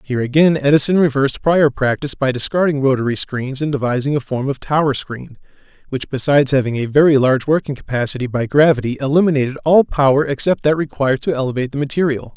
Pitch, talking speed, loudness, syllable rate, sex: 140 Hz, 180 wpm, -16 LUFS, 6.5 syllables/s, male